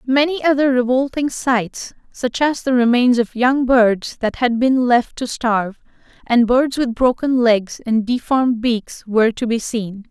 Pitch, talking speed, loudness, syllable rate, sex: 245 Hz, 170 wpm, -17 LUFS, 4.2 syllables/s, female